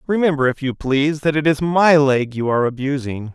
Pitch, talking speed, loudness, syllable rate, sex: 145 Hz, 215 wpm, -18 LUFS, 5.6 syllables/s, male